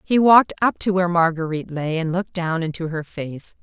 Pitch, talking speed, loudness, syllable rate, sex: 175 Hz, 215 wpm, -20 LUFS, 5.9 syllables/s, female